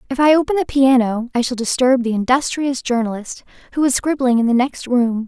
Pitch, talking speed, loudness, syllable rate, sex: 255 Hz, 205 wpm, -17 LUFS, 5.6 syllables/s, female